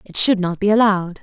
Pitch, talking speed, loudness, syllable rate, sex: 195 Hz, 245 wpm, -16 LUFS, 6.3 syllables/s, female